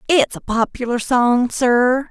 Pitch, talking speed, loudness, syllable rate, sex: 250 Hz, 145 wpm, -17 LUFS, 3.6 syllables/s, female